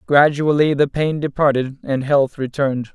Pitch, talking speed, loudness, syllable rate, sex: 140 Hz, 145 wpm, -18 LUFS, 4.9 syllables/s, male